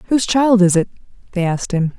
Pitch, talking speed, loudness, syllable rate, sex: 200 Hz, 210 wpm, -16 LUFS, 7.0 syllables/s, female